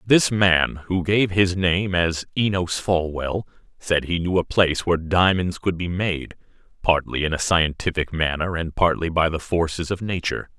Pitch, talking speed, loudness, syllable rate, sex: 85 Hz, 175 wpm, -21 LUFS, 4.6 syllables/s, male